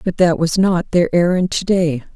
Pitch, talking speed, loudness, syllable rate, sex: 175 Hz, 225 wpm, -16 LUFS, 4.8 syllables/s, female